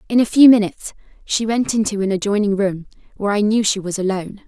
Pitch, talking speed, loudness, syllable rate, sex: 205 Hz, 215 wpm, -17 LUFS, 6.5 syllables/s, female